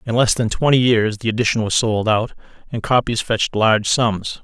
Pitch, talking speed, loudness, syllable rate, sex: 115 Hz, 205 wpm, -17 LUFS, 5.3 syllables/s, male